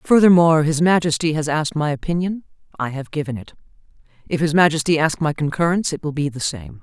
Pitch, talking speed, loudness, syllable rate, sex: 155 Hz, 195 wpm, -19 LUFS, 6.4 syllables/s, female